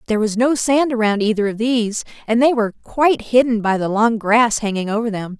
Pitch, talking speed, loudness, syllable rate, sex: 225 Hz, 220 wpm, -17 LUFS, 5.9 syllables/s, female